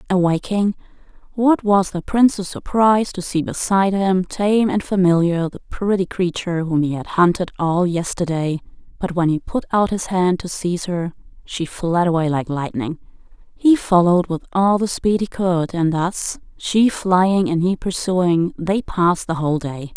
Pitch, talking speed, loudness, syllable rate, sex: 180 Hz, 170 wpm, -19 LUFS, 4.6 syllables/s, female